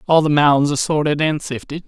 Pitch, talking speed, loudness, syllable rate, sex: 150 Hz, 225 wpm, -17 LUFS, 5.9 syllables/s, male